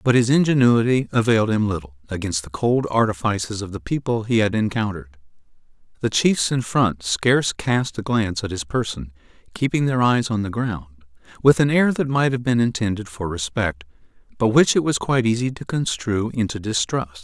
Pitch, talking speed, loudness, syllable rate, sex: 110 Hz, 185 wpm, -20 LUFS, 5.4 syllables/s, male